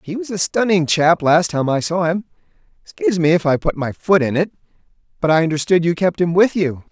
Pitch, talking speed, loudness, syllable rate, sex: 165 Hz, 225 wpm, -17 LUFS, 6.0 syllables/s, male